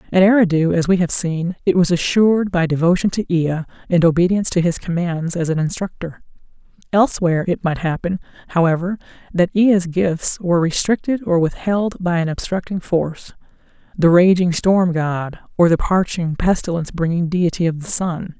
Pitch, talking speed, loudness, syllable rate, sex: 175 Hz, 160 wpm, -18 LUFS, 5.4 syllables/s, female